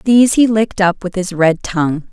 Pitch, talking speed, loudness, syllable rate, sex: 195 Hz, 225 wpm, -14 LUFS, 5.5 syllables/s, female